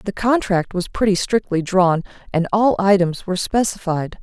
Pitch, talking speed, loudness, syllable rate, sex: 190 Hz, 155 wpm, -19 LUFS, 4.7 syllables/s, female